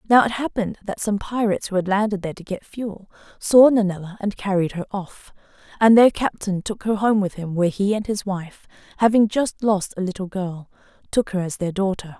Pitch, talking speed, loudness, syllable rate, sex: 200 Hz, 210 wpm, -21 LUFS, 5.5 syllables/s, female